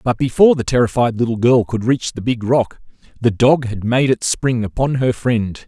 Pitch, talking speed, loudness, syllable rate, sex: 120 Hz, 210 wpm, -17 LUFS, 5.0 syllables/s, male